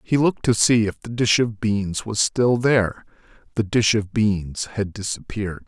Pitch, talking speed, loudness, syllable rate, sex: 105 Hz, 190 wpm, -21 LUFS, 4.6 syllables/s, male